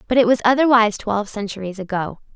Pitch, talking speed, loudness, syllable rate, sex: 220 Hz, 180 wpm, -18 LUFS, 6.8 syllables/s, female